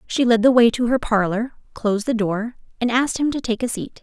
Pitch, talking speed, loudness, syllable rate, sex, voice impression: 230 Hz, 255 wpm, -20 LUFS, 5.7 syllables/s, female, feminine, adult-like, tensed, bright, clear, fluent, slightly intellectual, calm, elegant, slightly lively, slightly sharp